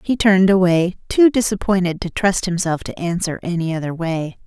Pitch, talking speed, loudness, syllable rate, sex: 185 Hz, 175 wpm, -18 LUFS, 5.3 syllables/s, female